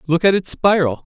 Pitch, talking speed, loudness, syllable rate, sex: 175 Hz, 220 wpm, -16 LUFS, 5.5 syllables/s, male